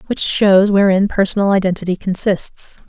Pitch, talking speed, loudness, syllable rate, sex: 195 Hz, 125 wpm, -15 LUFS, 4.9 syllables/s, female